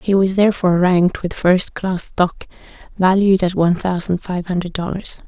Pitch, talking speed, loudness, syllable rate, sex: 185 Hz, 160 wpm, -17 LUFS, 5.1 syllables/s, female